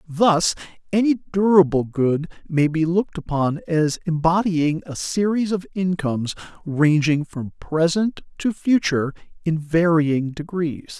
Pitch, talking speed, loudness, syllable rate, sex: 165 Hz, 120 wpm, -21 LUFS, 4.1 syllables/s, male